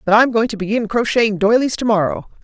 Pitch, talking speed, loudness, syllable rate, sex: 220 Hz, 195 wpm, -16 LUFS, 6.3 syllables/s, female